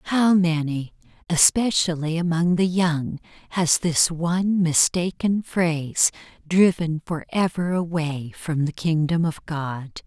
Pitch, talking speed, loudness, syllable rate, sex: 170 Hz, 115 wpm, -22 LUFS, 3.8 syllables/s, female